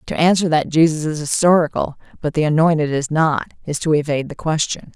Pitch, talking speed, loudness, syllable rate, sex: 155 Hz, 195 wpm, -18 LUFS, 5.8 syllables/s, female